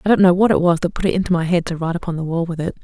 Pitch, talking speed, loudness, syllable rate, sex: 175 Hz, 400 wpm, -18 LUFS, 8.1 syllables/s, female